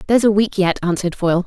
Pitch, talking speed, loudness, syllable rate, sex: 190 Hz, 245 wpm, -17 LUFS, 7.9 syllables/s, female